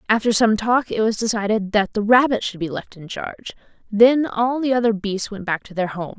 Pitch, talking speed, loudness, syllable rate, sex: 215 Hz, 235 wpm, -20 LUFS, 5.5 syllables/s, female